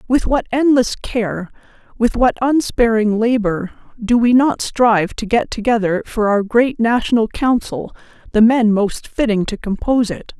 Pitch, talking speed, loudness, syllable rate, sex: 230 Hz, 155 wpm, -16 LUFS, 4.5 syllables/s, female